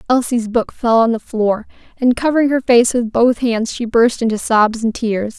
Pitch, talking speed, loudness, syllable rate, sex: 235 Hz, 210 wpm, -16 LUFS, 4.7 syllables/s, female